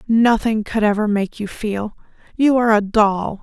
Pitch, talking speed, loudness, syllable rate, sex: 215 Hz, 175 wpm, -18 LUFS, 4.5 syllables/s, female